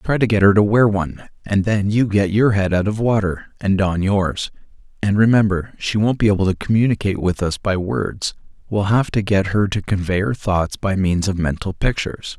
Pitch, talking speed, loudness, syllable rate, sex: 100 Hz, 215 wpm, -18 LUFS, 5.2 syllables/s, male